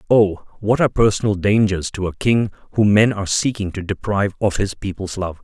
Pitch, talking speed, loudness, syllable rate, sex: 100 Hz, 200 wpm, -19 LUFS, 5.7 syllables/s, male